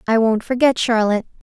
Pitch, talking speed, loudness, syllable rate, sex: 230 Hz, 160 wpm, -17 LUFS, 6.3 syllables/s, female